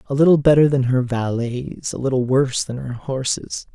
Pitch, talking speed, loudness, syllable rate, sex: 130 Hz, 190 wpm, -19 LUFS, 5.1 syllables/s, male